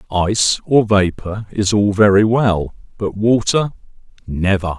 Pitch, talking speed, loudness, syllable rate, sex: 100 Hz, 115 wpm, -16 LUFS, 4.0 syllables/s, male